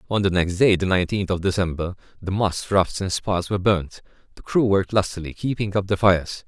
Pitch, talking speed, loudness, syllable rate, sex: 95 Hz, 215 wpm, -22 LUFS, 6.0 syllables/s, male